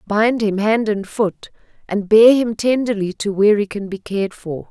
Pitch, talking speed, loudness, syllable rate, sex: 210 Hz, 205 wpm, -17 LUFS, 4.8 syllables/s, female